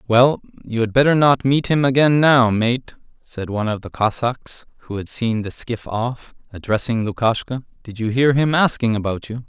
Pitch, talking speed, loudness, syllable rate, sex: 120 Hz, 190 wpm, -19 LUFS, 4.8 syllables/s, male